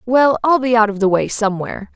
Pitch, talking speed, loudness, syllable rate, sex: 225 Hz, 245 wpm, -16 LUFS, 6.1 syllables/s, female